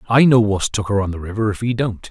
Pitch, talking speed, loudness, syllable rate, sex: 110 Hz, 315 wpm, -18 LUFS, 6.2 syllables/s, male